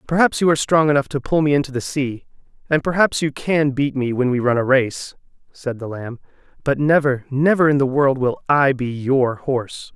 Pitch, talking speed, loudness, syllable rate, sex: 140 Hz, 215 wpm, -19 LUFS, 5.2 syllables/s, male